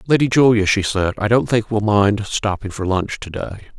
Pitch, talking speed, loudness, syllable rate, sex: 105 Hz, 220 wpm, -18 LUFS, 5.1 syllables/s, male